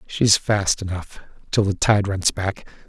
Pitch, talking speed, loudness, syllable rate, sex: 100 Hz, 165 wpm, -20 LUFS, 4.1 syllables/s, male